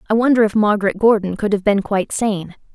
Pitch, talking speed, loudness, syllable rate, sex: 210 Hz, 220 wpm, -17 LUFS, 6.3 syllables/s, female